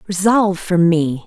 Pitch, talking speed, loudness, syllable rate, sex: 180 Hz, 140 wpm, -15 LUFS, 4.4 syllables/s, female